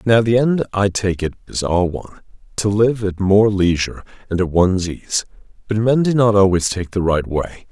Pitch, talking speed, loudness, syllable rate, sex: 100 Hz, 210 wpm, -17 LUFS, 5.0 syllables/s, male